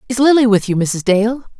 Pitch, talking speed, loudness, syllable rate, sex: 225 Hz, 225 wpm, -14 LUFS, 4.7 syllables/s, female